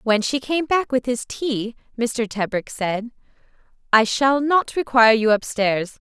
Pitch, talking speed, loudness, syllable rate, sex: 240 Hz, 155 wpm, -20 LUFS, 4.2 syllables/s, female